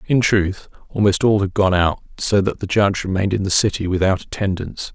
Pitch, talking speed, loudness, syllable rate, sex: 95 Hz, 205 wpm, -18 LUFS, 5.9 syllables/s, male